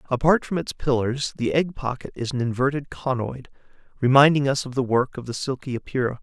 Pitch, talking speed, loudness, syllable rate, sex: 130 Hz, 195 wpm, -23 LUFS, 5.8 syllables/s, male